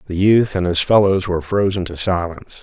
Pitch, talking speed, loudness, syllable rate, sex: 95 Hz, 205 wpm, -17 LUFS, 5.7 syllables/s, male